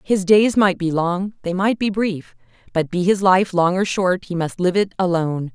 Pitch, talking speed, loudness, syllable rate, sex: 185 Hz, 225 wpm, -19 LUFS, 4.7 syllables/s, female